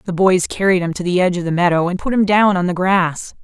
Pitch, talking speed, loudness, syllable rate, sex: 180 Hz, 295 wpm, -16 LUFS, 6.2 syllables/s, female